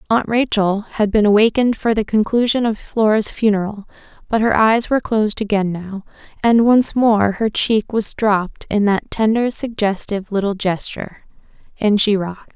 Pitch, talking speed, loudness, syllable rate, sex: 215 Hz, 165 wpm, -17 LUFS, 5.0 syllables/s, female